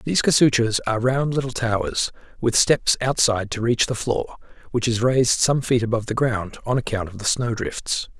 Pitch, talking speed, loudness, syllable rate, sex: 120 Hz, 200 wpm, -21 LUFS, 5.4 syllables/s, male